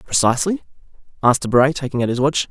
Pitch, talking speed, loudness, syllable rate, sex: 135 Hz, 170 wpm, -18 LUFS, 7.1 syllables/s, male